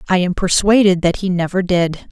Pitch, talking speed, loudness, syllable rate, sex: 180 Hz, 200 wpm, -15 LUFS, 5.2 syllables/s, female